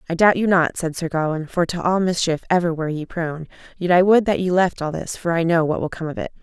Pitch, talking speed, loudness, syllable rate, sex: 170 Hz, 290 wpm, -20 LUFS, 6.2 syllables/s, female